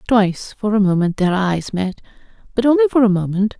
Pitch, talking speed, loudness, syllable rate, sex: 210 Hz, 200 wpm, -17 LUFS, 5.7 syllables/s, female